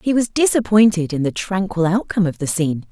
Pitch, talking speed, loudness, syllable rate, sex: 190 Hz, 205 wpm, -18 LUFS, 6.0 syllables/s, female